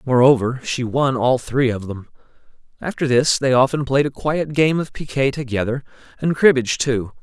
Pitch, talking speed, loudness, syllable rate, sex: 130 Hz, 175 wpm, -19 LUFS, 5.1 syllables/s, male